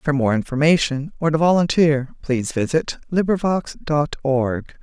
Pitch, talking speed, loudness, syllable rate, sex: 150 Hz, 135 wpm, -20 LUFS, 4.6 syllables/s, female